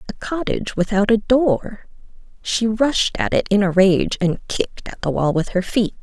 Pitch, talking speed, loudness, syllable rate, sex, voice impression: 205 Hz, 190 wpm, -19 LUFS, 4.7 syllables/s, female, feminine, adult-like, slightly soft, slightly sincere, calm, slightly elegant